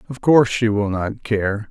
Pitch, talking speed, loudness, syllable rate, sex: 110 Hz, 210 wpm, -18 LUFS, 4.6 syllables/s, male